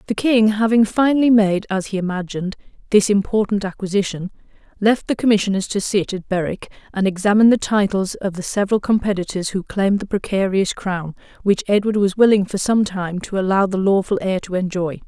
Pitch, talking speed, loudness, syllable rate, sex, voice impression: 200 Hz, 180 wpm, -18 LUFS, 5.8 syllables/s, female, feminine, slightly adult-like, slightly tensed, sincere, slightly reassuring